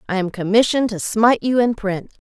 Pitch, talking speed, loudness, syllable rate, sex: 215 Hz, 210 wpm, -18 LUFS, 6.2 syllables/s, female